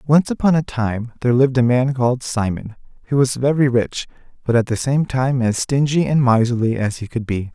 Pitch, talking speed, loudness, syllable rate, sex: 125 Hz, 215 wpm, -18 LUFS, 5.5 syllables/s, male